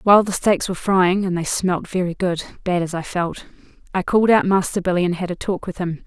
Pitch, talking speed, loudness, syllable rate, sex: 185 Hz, 230 wpm, -20 LUFS, 5.8 syllables/s, female